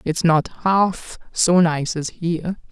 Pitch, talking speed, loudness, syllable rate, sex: 170 Hz, 155 wpm, -19 LUFS, 3.3 syllables/s, female